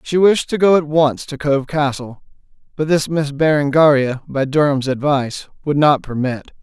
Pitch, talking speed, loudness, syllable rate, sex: 145 Hz, 170 wpm, -16 LUFS, 4.7 syllables/s, male